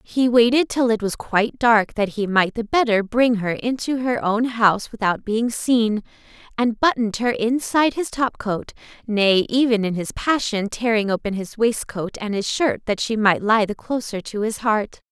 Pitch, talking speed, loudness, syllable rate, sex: 225 Hz, 190 wpm, -20 LUFS, 4.7 syllables/s, female